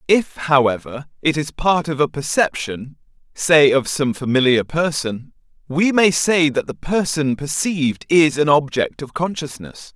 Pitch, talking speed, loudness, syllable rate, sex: 150 Hz, 150 wpm, -18 LUFS, 4.3 syllables/s, male